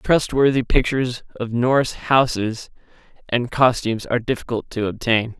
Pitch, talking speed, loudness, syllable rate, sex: 120 Hz, 120 wpm, -20 LUFS, 4.9 syllables/s, male